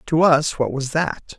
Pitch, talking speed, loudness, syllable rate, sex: 150 Hz, 215 wpm, -19 LUFS, 3.9 syllables/s, male